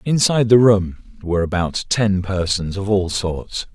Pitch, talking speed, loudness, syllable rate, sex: 100 Hz, 160 wpm, -18 LUFS, 4.5 syllables/s, male